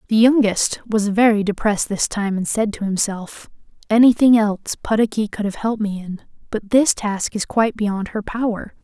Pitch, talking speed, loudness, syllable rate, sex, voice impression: 215 Hz, 185 wpm, -19 LUFS, 5.1 syllables/s, female, very feminine, young, slightly adult-like, slightly tensed, slightly weak, bright, slightly hard, clear, fluent, very cute, intellectual, very refreshing, sincere, calm, friendly, reassuring, slightly unique, elegant, slightly wild, sweet, slightly lively, kind